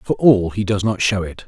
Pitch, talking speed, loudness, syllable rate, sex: 100 Hz, 285 wpm, -18 LUFS, 5.2 syllables/s, male